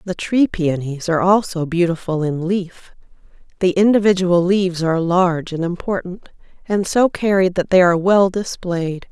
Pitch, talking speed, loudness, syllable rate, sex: 180 Hz, 150 wpm, -17 LUFS, 4.9 syllables/s, female